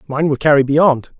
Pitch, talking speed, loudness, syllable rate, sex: 145 Hz, 200 wpm, -14 LUFS, 5.1 syllables/s, male